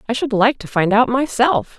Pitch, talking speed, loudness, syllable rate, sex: 240 Hz, 235 wpm, -17 LUFS, 5.0 syllables/s, female